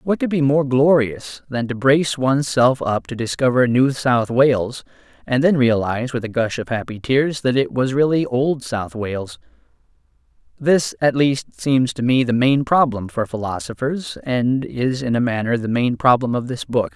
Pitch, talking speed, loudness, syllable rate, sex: 125 Hz, 190 wpm, -19 LUFS, 4.5 syllables/s, male